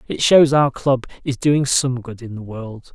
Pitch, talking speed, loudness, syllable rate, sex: 125 Hz, 225 wpm, -17 LUFS, 4.2 syllables/s, male